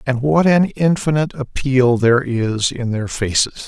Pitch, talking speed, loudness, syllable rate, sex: 130 Hz, 165 wpm, -17 LUFS, 4.5 syllables/s, male